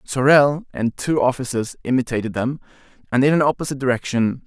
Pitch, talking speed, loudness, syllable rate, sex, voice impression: 130 Hz, 150 wpm, -19 LUFS, 5.9 syllables/s, male, masculine, adult-like, powerful, slightly halting, raspy, sincere, friendly, unique, wild, lively, intense